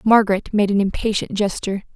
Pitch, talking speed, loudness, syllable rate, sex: 205 Hz, 155 wpm, -19 LUFS, 6.3 syllables/s, female